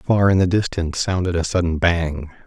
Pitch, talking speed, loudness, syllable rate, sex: 90 Hz, 195 wpm, -19 LUFS, 5.3 syllables/s, male